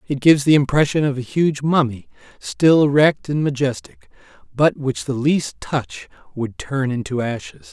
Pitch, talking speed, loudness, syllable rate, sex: 140 Hz, 165 wpm, -19 LUFS, 4.6 syllables/s, male